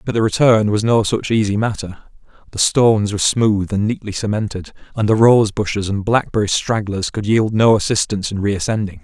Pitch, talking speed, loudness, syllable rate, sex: 105 Hz, 200 wpm, -17 LUFS, 5.6 syllables/s, male